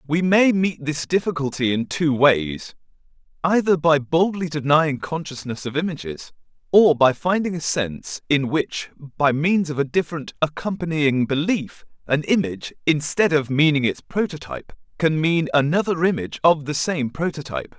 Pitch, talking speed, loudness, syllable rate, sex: 155 Hz, 150 wpm, -21 LUFS, 4.9 syllables/s, male